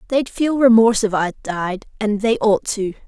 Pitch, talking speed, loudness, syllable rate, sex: 220 Hz, 195 wpm, -18 LUFS, 4.8 syllables/s, female